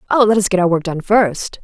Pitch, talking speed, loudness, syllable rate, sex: 195 Hz, 295 wpm, -15 LUFS, 5.7 syllables/s, female